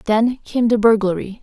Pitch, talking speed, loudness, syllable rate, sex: 220 Hz, 170 wpm, -17 LUFS, 4.7 syllables/s, female